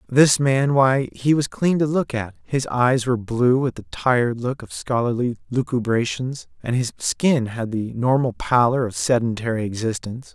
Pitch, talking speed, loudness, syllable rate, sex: 125 Hz, 170 wpm, -21 LUFS, 4.6 syllables/s, male